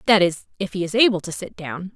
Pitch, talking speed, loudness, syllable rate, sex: 185 Hz, 275 wpm, -21 LUFS, 6.2 syllables/s, female